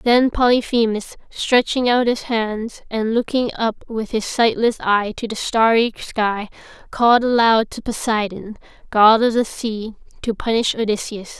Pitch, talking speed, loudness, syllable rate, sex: 225 Hz, 145 wpm, -18 LUFS, 4.3 syllables/s, female